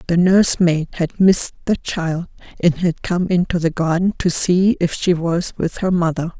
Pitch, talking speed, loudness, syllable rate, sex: 175 Hz, 190 wpm, -18 LUFS, 4.7 syllables/s, female